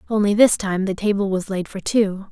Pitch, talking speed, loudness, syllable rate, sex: 200 Hz, 235 wpm, -20 LUFS, 5.3 syllables/s, female